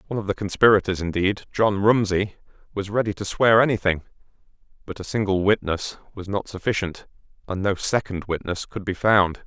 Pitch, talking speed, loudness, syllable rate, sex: 100 Hz, 165 wpm, -22 LUFS, 5.5 syllables/s, male